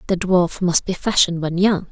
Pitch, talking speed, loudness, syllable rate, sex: 180 Hz, 220 wpm, -18 LUFS, 5.2 syllables/s, female